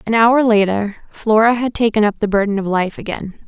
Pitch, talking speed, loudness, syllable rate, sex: 215 Hz, 205 wpm, -16 LUFS, 5.2 syllables/s, female